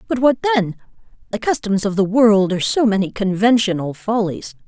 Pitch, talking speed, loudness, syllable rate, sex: 210 Hz, 165 wpm, -17 LUFS, 5.4 syllables/s, female